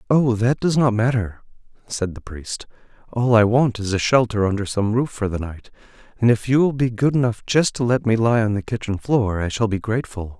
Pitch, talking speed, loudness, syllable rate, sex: 115 Hz, 230 wpm, -20 LUFS, 5.3 syllables/s, male